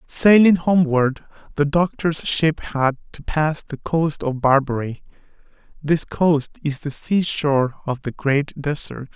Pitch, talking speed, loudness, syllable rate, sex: 150 Hz, 140 wpm, -20 LUFS, 4.0 syllables/s, male